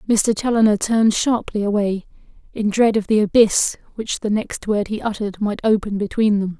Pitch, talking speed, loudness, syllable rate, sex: 210 Hz, 180 wpm, -19 LUFS, 5.2 syllables/s, female